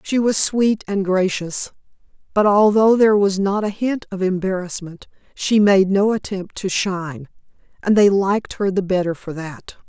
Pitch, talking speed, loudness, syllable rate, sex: 195 Hz, 170 wpm, -18 LUFS, 4.6 syllables/s, female